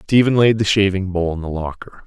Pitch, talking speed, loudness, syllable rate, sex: 100 Hz, 205 wpm, -17 LUFS, 5.6 syllables/s, male